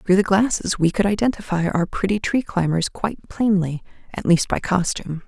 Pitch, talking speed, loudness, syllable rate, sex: 190 Hz, 195 wpm, -21 LUFS, 5.5 syllables/s, female